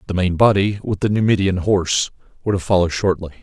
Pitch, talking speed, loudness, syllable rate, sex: 95 Hz, 195 wpm, -18 LUFS, 6.5 syllables/s, male